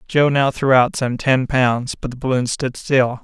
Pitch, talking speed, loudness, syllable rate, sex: 130 Hz, 225 wpm, -18 LUFS, 4.2 syllables/s, male